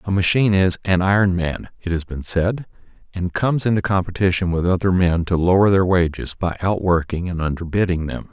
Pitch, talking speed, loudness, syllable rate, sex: 90 Hz, 190 wpm, -19 LUFS, 5.6 syllables/s, male